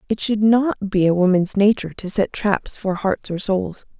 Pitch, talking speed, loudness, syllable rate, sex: 200 Hz, 210 wpm, -19 LUFS, 4.7 syllables/s, female